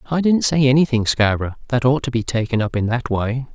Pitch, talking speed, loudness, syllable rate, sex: 125 Hz, 235 wpm, -18 LUFS, 6.1 syllables/s, male